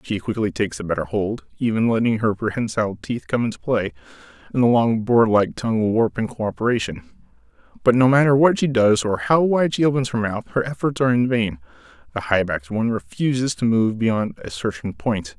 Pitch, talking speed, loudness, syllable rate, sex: 110 Hz, 205 wpm, -20 LUFS, 5.8 syllables/s, male